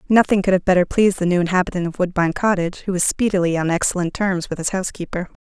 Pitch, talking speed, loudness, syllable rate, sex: 185 Hz, 220 wpm, -19 LUFS, 7.2 syllables/s, female